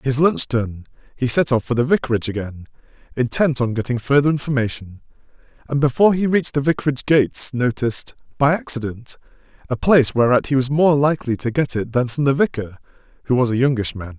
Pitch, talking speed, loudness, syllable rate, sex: 130 Hz, 185 wpm, -18 LUFS, 6.3 syllables/s, male